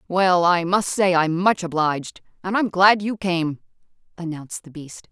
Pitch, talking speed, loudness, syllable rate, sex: 175 Hz, 175 wpm, -20 LUFS, 4.6 syllables/s, female